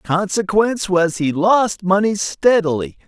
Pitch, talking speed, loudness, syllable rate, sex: 190 Hz, 115 wpm, -17 LUFS, 4.1 syllables/s, male